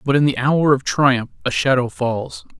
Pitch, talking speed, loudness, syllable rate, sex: 135 Hz, 210 wpm, -18 LUFS, 4.5 syllables/s, male